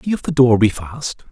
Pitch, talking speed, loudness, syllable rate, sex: 130 Hz, 275 wpm, -16 LUFS, 5.2 syllables/s, male